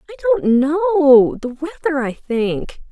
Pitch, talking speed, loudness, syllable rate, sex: 275 Hz, 125 wpm, -17 LUFS, 5.5 syllables/s, female